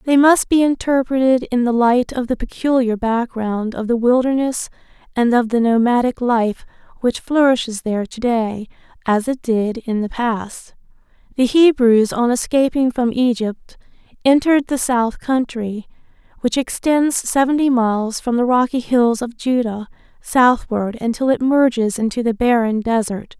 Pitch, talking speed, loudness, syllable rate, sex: 240 Hz, 150 wpm, -17 LUFS, 4.5 syllables/s, female